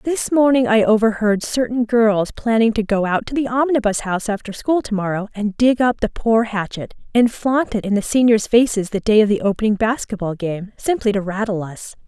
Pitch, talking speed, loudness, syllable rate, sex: 220 Hz, 210 wpm, -18 LUFS, 5.3 syllables/s, female